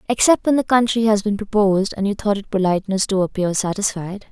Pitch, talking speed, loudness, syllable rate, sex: 205 Hz, 210 wpm, -19 LUFS, 6.1 syllables/s, female